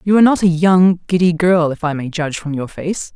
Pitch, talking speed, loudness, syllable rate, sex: 170 Hz, 265 wpm, -15 LUFS, 5.6 syllables/s, female